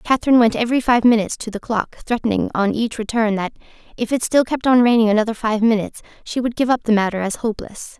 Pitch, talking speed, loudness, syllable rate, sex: 225 Hz, 225 wpm, -18 LUFS, 6.6 syllables/s, female